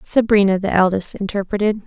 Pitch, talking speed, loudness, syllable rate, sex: 200 Hz, 130 wpm, -17 LUFS, 5.7 syllables/s, female